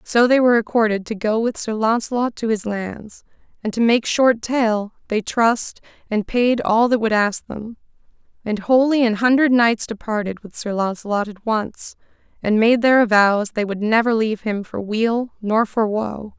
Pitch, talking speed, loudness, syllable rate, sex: 220 Hz, 185 wpm, -19 LUFS, 4.6 syllables/s, female